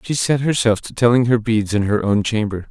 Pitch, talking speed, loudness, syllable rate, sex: 115 Hz, 245 wpm, -17 LUFS, 5.4 syllables/s, male